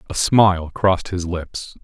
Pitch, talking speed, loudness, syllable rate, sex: 90 Hz, 165 wpm, -18 LUFS, 4.6 syllables/s, male